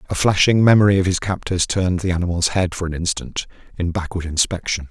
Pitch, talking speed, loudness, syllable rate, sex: 90 Hz, 195 wpm, -19 LUFS, 6.1 syllables/s, male